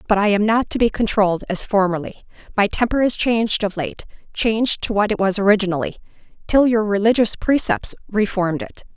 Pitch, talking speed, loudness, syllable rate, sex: 210 Hz, 180 wpm, -19 LUFS, 5.8 syllables/s, female